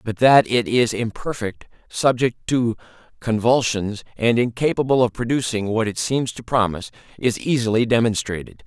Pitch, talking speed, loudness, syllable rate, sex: 115 Hz, 140 wpm, -20 LUFS, 5.0 syllables/s, male